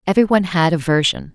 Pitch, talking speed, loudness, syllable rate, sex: 175 Hz, 180 wpm, -16 LUFS, 6.6 syllables/s, female